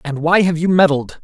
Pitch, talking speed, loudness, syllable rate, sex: 165 Hz, 245 wpm, -14 LUFS, 5.3 syllables/s, male